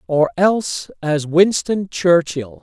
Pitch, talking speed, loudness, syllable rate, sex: 165 Hz, 115 wpm, -17 LUFS, 3.5 syllables/s, male